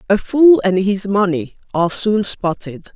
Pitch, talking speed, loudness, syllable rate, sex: 200 Hz, 165 wpm, -16 LUFS, 4.4 syllables/s, female